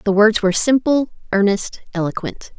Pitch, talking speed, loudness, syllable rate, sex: 210 Hz, 140 wpm, -18 LUFS, 5.2 syllables/s, female